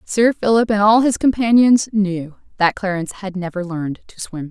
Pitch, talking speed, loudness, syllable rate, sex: 200 Hz, 185 wpm, -17 LUFS, 5.1 syllables/s, female